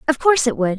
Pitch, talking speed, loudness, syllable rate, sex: 260 Hz, 305 wpm, -17 LUFS, 7.4 syllables/s, female